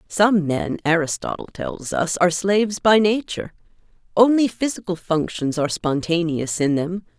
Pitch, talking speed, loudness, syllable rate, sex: 180 Hz, 135 wpm, -20 LUFS, 4.8 syllables/s, female